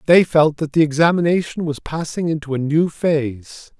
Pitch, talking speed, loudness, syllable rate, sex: 155 Hz, 175 wpm, -18 LUFS, 5.0 syllables/s, male